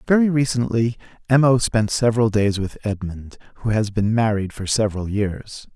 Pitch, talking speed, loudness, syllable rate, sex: 110 Hz, 165 wpm, -20 LUFS, 5.1 syllables/s, male